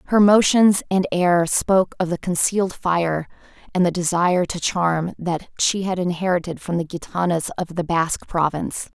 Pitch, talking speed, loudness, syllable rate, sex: 175 Hz, 165 wpm, -20 LUFS, 4.9 syllables/s, female